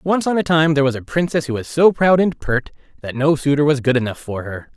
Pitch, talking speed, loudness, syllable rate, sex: 145 Hz, 275 wpm, -17 LUFS, 5.9 syllables/s, male